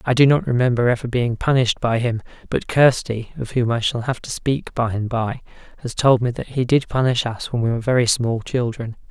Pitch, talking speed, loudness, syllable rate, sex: 120 Hz, 230 wpm, -20 LUFS, 4.7 syllables/s, male